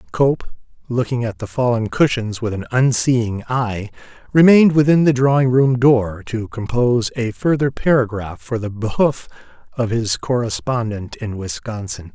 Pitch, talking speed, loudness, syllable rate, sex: 120 Hz, 145 wpm, -18 LUFS, 4.6 syllables/s, male